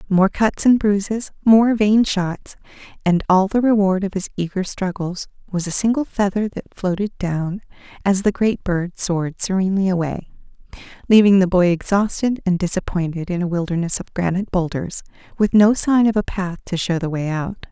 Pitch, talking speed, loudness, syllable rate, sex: 190 Hz, 175 wpm, -19 LUFS, 5.0 syllables/s, female